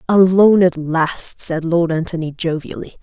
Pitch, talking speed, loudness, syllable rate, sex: 170 Hz, 140 wpm, -16 LUFS, 4.7 syllables/s, female